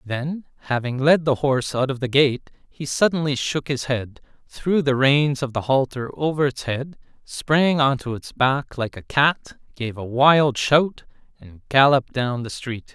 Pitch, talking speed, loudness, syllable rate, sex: 135 Hz, 180 wpm, -21 LUFS, 4.2 syllables/s, male